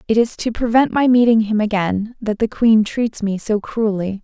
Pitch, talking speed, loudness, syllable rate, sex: 220 Hz, 215 wpm, -17 LUFS, 4.7 syllables/s, female